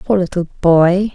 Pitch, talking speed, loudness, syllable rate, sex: 180 Hz, 155 wpm, -14 LUFS, 4.5 syllables/s, female